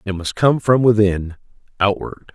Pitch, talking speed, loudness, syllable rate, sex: 105 Hz, 155 wpm, -17 LUFS, 4.4 syllables/s, male